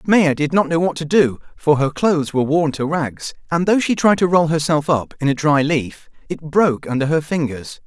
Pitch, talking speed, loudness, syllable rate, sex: 155 Hz, 235 wpm, -18 LUFS, 5.2 syllables/s, male